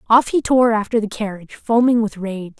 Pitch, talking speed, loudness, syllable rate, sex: 220 Hz, 210 wpm, -18 LUFS, 5.4 syllables/s, female